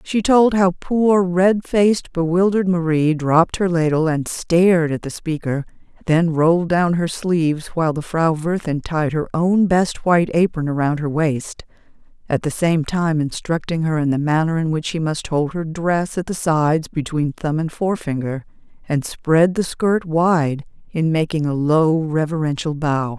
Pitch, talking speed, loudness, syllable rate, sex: 165 Hz, 175 wpm, -19 LUFS, 4.5 syllables/s, female